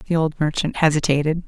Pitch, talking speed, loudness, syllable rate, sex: 155 Hz, 165 wpm, -20 LUFS, 6.3 syllables/s, female